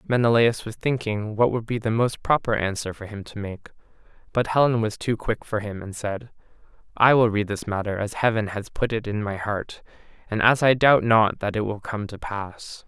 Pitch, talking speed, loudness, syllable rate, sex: 110 Hz, 220 wpm, -23 LUFS, 5.0 syllables/s, male